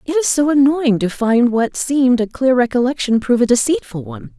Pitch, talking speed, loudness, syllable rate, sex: 245 Hz, 205 wpm, -15 LUFS, 5.6 syllables/s, female